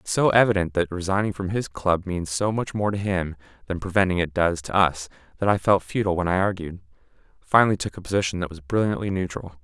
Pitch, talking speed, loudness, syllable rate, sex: 90 Hz, 220 wpm, -23 LUFS, 6.1 syllables/s, male